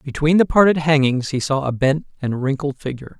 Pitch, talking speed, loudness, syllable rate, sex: 145 Hz, 205 wpm, -18 LUFS, 5.6 syllables/s, male